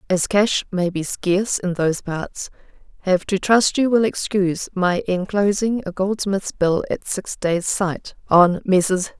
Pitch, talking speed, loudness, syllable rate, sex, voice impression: 190 Hz, 165 wpm, -20 LUFS, 4.0 syllables/s, female, feminine, adult-like, calm, elegant, sweet